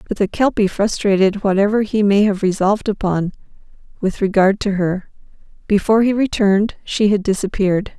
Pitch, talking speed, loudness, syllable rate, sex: 200 Hz, 150 wpm, -17 LUFS, 5.5 syllables/s, female